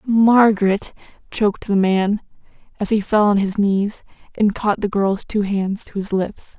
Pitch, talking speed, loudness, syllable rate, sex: 205 Hz, 175 wpm, -18 LUFS, 4.2 syllables/s, female